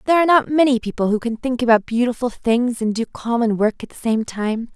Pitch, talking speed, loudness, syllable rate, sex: 235 Hz, 240 wpm, -19 LUFS, 5.9 syllables/s, female